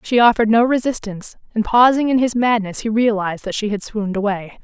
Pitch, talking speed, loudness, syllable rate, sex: 220 Hz, 205 wpm, -17 LUFS, 6.2 syllables/s, female